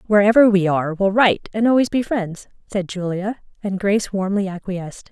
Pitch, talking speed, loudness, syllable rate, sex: 200 Hz, 175 wpm, -19 LUFS, 5.6 syllables/s, female